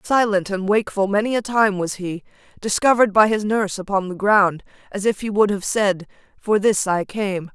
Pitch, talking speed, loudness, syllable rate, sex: 205 Hz, 200 wpm, -19 LUFS, 5.2 syllables/s, female